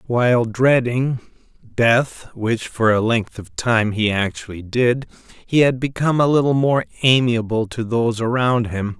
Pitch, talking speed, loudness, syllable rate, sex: 120 Hz, 140 wpm, -18 LUFS, 4.3 syllables/s, male